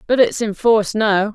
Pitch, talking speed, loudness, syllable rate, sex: 210 Hz, 225 wpm, -16 LUFS, 5.0 syllables/s, female